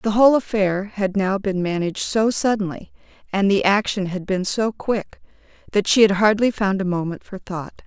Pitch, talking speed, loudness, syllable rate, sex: 200 Hz, 190 wpm, -20 LUFS, 5.0 syllables/s, female